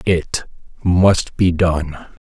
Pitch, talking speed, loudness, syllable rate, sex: 85 Hz, 80 wpm, -17 LUFS, 2.5 syllables/s, male